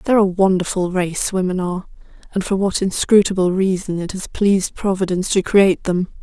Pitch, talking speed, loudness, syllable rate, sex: 190 Hz, 175 wpm, -18 LUFS, 5.8 syllables/s, female